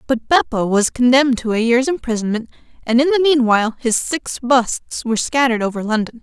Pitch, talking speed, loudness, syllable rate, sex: 245 Hz, 185 wpm, -17 LUFS, 5.7 syllables/s, female